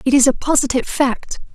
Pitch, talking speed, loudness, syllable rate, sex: 265 Hz, 195 wpm, -16 LUFS, 6.2 syllables/s, female